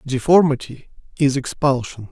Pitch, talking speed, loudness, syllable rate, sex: 135 Hz, 85 wpm, -18 LUFS, 4.7 syllables/s, male